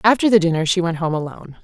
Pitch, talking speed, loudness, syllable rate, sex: 180 Hz, 255 wpm, -18 LUFS, 7.4 syllables/s, female